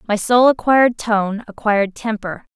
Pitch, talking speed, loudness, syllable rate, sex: 220 Hz, 120 wpm, -17 LUFS, 4.8 syllables/s, female